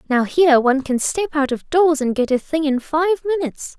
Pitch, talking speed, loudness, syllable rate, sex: 300 Hz, 240 wpm, -18 LUFS, 5.9 syllables/s, female